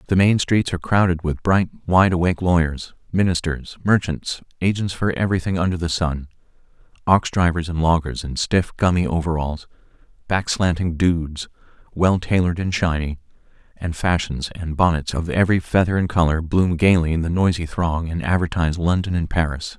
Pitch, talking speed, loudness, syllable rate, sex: 85 Hz, 160 wpm, -20 LUFS, 5.3 syllables/s, male